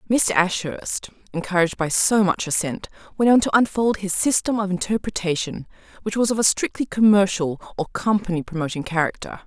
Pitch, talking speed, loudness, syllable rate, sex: 195 Hz, 160 wpm, -21 LUFS, 5.4 syllables/s, female